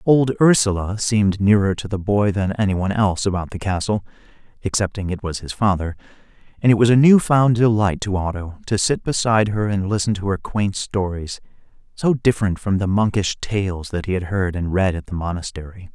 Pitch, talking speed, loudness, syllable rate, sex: 100 Hz, 190 wpm, -19 LUFS, 5.5 syllables/s, male